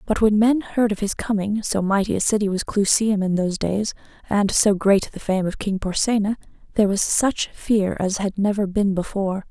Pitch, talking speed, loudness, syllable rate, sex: 205 Hz, 210 wpm, -21 LUFS, 5.2 syllables/s, female